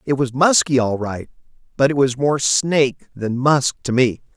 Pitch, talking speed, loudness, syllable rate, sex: 135 Hz, 195 wpm, -18 LUFS, 4.5 syllables/s, male